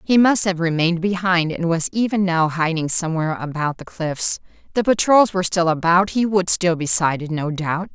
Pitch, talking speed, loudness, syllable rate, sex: 175 Hz, 195 wpm, -19 LUFS, 5.2 syllables/s, female